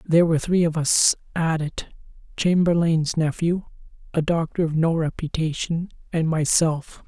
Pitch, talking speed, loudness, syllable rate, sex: 160 Hz, 135 wpm, -22 LUFS, 4.7 syllables/s, male